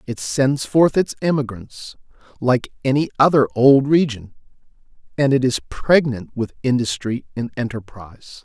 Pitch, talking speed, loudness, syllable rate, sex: 130 Hz, 130 wpm, -19 LUFS, 4.5 syllables/s, male